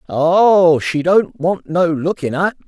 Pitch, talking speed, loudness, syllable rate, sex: 175 Hz, 155 wpm, -15 LUFS, 3.3 syllables/s, male